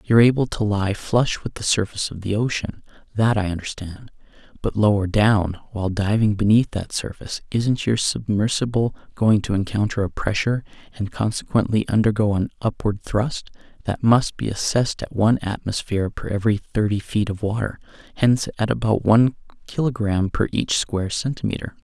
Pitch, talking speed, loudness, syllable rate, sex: 105 Hz, 160 wpm, -21 LUFS, 5.4 syllables/s, male